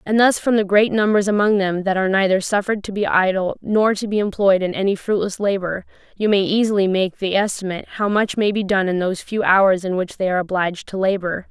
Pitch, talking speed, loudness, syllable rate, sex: 195 Hz, 235 wpm, -19 LUFS, 6.0 syllables/s, female